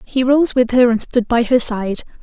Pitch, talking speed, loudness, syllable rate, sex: 240 Hz, 245 wpm, -15 LUFS, 4.6 syllables/s, female